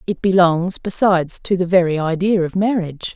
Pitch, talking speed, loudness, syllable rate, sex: 180 Hz, 170 wpm, -17 LUFS, 5.3 syllables/s, female